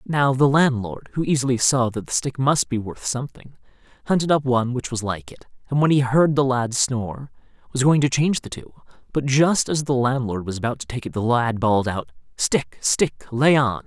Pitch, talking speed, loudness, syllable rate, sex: 130 Hz, 220 wpm, -21 LUFS, 5.3 syllables/s, male